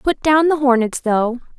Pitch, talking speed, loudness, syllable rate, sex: 265 Hz, 190 wpm, -16 LUFS, 4.4 syllables/s, female